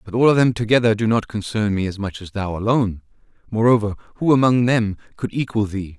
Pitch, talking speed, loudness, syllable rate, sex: 110 Hz, 210 wpm, -19 LUFS, 6.0 syllables/s, male